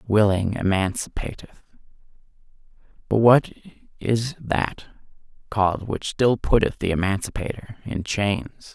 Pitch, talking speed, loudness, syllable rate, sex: 105 Hz, 95 wpm, -23 LUFS, 4.3 syllables/s, male